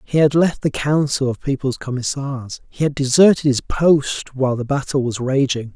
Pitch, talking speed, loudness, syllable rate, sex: 135 Hz, 190 wpm, -18 LUFS, 4.8 syllables/s, male